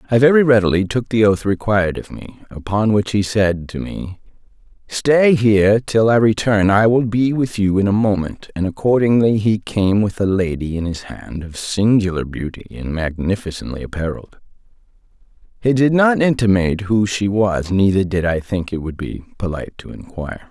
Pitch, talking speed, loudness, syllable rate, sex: 100 Hz, 180 wpm, -17 LUFS, 5.1 syllables/s, male